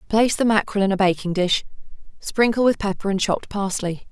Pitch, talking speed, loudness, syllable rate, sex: 200 Hz, 190 wpm, -21 LUFS, 6.2 syllables/s, female